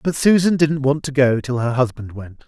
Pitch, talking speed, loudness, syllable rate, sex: 135 Hz, 240 wpm, -18 LUFS, 5.1 syllables/s, male